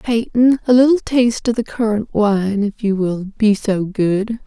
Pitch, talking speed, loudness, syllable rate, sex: 220 Hz, 175 wpm, -16 LUFS, 4.3 syllables/s, female